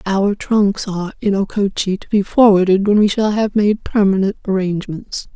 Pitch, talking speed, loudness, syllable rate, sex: 200 Hz, 170 wpm, -16 LUFS, 5.0 syllables/s, female